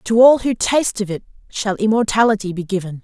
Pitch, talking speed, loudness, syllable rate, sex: 210 Hz, 200 wpm, -17 LUFS, 5.8 syllables/s, female